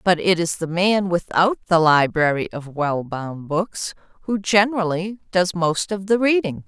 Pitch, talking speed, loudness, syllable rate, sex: 180 Hz, 170 wpm, -20 LUFS, 4.3 syllables/s, female